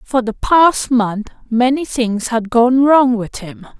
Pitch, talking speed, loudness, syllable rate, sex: 240 Hz, 175 wpm, -14 LUFS, 3.6 syllables/s, female